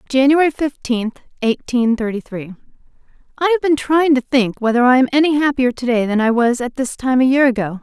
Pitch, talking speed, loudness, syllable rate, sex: 255 Hz, 190 wpm, -16 LUFS, 5.6 syllables/s, female